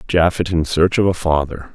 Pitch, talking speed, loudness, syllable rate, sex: 85 Hz, 205 wpm, -17 LUFS, 5.0 syllables/s, male